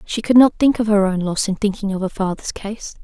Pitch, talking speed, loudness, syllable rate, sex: 205 Hz, 275 wpm, -18 LUFS, 5.6 syllables/s, female